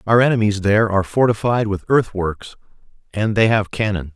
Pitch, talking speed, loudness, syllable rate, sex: 105 Hz, 160 wpm, -18 LUFS, 5.5 syllables/s, male